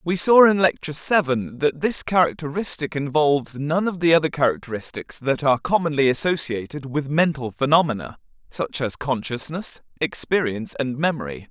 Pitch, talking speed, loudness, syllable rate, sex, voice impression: 145 Hz, 140 wpm, -21 LUFS, 5.3 syllables/s, male, masculine, adult-like, refreshing, sincere, friendly